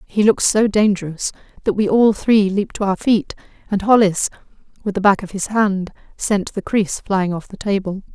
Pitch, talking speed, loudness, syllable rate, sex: 200 Hz, 200 wpm, -18 LUFS, 5.1 syllables/s, female